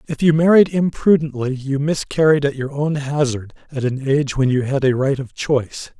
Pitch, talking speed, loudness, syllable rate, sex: 140 Hz, 200 wpm, -18 LUFS, 5.2 syllables/s, male